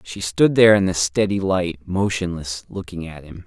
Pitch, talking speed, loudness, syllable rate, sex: 90 Hz, 190 wpm, -19 LUFS, 4.9 syllables/s, male